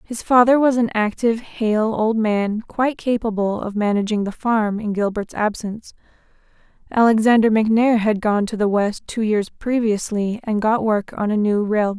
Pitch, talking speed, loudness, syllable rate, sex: 220 Hz, 170 wpm, -19 LUFS, 4.9 syllables/s, female